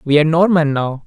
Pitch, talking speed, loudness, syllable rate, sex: 155 Hz, 225 wpm, -14 LUFS, 6.2 syllables/s, male